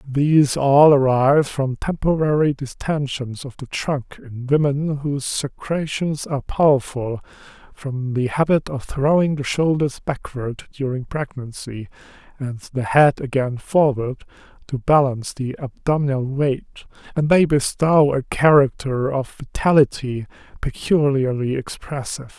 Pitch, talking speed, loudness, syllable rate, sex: 140 Hz, 120 wpm, -20 LUFS, 4.3 syllables/s, male